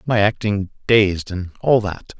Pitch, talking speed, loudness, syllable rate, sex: 100 Hz, 165 wpm, -19 LUFS, 4.0 syllables/s, male